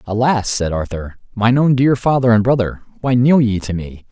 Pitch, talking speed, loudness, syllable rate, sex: 115 Hz, 205 wpm, -16 LUFS, 5.0 syllables/s, male